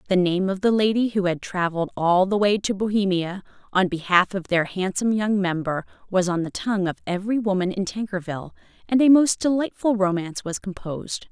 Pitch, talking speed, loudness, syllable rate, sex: 195 Hz, 190 wpm, -22 LUFS, 5.8 syllables/s, female